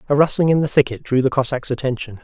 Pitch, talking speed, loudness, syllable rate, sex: 135 Hz, 240 wpm, -18 LUFS, 6.8 syllables/s, male